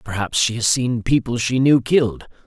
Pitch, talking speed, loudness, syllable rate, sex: 120 Hz, 195 wpm, -18 LUFS, 5.0 syllables/s, male